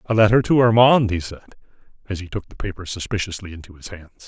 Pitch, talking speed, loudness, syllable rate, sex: 100 Hz, 210 wpm, -19 LUFS, 6.6 syllables/s, male